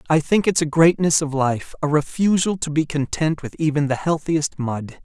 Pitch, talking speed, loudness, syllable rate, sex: 155 Hz, 190 wpm, -20 LUFS, 4.9 syllables/s, male